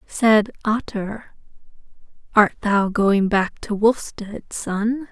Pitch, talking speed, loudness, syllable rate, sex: 210 Hz, 105 wpm, -20 LUFS, 2.9 syllables/s, female